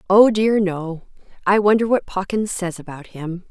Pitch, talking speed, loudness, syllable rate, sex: 190 Hz, 170 wpm, -19 LUFS, 4.6 syllables/s, female